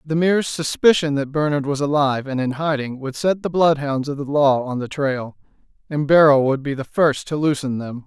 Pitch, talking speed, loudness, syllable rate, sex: 145 Hz, 215 wpm, -19 LUFS, 5.2 syllables/s, male